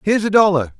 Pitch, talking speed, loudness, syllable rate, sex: 175 Hz, 230 wpm, -15 LUFS, 7.5 syllables/s, male